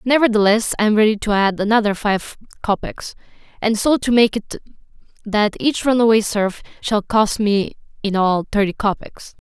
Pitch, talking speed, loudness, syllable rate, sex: 215 Hz, 160 wpm, -18 LUFS, 4.9 syllables/s, female